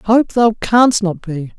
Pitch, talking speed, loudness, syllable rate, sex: 210 Hz, 190 wpm, -14 LUFS, 3.3 syllables/s, male